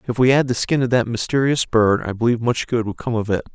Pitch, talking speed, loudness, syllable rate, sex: 120 Hz, 285 wpm, -19 LUFS, 6.4 syllables/s, male